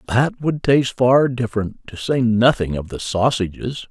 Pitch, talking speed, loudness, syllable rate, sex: 120 Hz, 170 wpm, -19 LUFS, 4.8 syllables/s, male